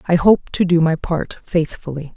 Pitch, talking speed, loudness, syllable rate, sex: 165 Hz, 195 wpm, -18 LUFS, 4.7 syllables/s, female